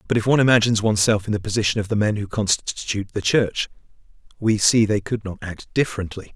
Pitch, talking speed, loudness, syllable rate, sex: 105 Hz, 210 wpm, -21 LUFS, 6.6 syllables/s, male